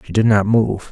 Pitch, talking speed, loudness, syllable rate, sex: 105 Hz, 260 wpm, -16 LUFS, 5.1 syllables/s, male